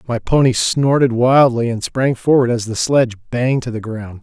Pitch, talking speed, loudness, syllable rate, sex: 120 Hz, 200 wpm, -16 LUFS, 4.9 syllables/s, male